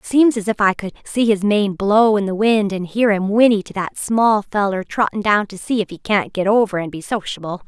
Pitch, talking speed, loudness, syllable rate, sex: 205 Hz, 250 wpm, -18 LUFS, 5.1 syllables/s, female